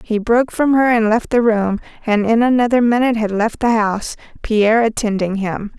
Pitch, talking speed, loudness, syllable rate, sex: 225 Hz, 195 wpm, -16 LUFS, 5.4 syllables/s, female